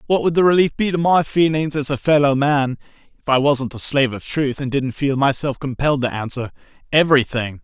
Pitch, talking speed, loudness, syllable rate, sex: 140 Hz, 195 wpm, -18 LUFS, 5.7 syllables/s, male